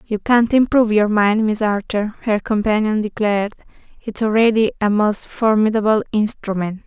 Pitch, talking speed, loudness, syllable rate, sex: 215 Hz, 140 wpm, -17 LUFS, 5.0 syllables/s, female